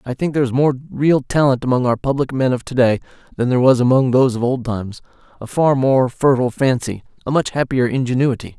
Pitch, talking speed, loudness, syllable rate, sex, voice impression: 130 Hz, 210 wpm, -17 LUFS, 6.3 syllables/s, male, masculine, adult-like, slightly relaxed, slightly weak, bright, slightly halting, sincere, calm, friendly, reassuring, slightly wild, lively, slightly modest, light